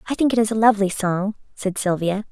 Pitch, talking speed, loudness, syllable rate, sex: 205 Hz, 235 wpm, -20 LUFS, 6.4 syllables/s, female